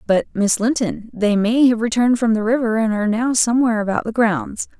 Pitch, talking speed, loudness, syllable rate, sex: 225 Hz, 215 wpm, -18 LUFS, 5.8 syllables/s, female